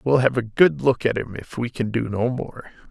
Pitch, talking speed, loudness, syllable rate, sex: 120 Hz, 270 wpm, -22 LUFS, 4.9 syllables/s, male